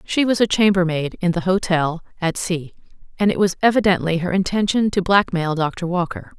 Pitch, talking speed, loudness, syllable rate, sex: 185 Hz, 180 wpm, -19 LUFS, 5.4 syllables/s, female